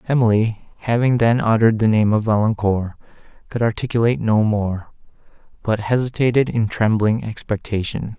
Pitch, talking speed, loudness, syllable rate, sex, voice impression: 110 Hz, 125 wpm, -19 LUFS, 5.3 syllables/s, male, very masculine, middle-aged, very thick, slightly relaxed, weak, very dark, very soft, very muffled, slightly fluent, raspy, slightly cool, intellectual, slightly refreshing, sincere, very calm, slightly friendly, slightly reassuring, very unique, elegant, slightly wild, sweet, lively, kind, slightly modest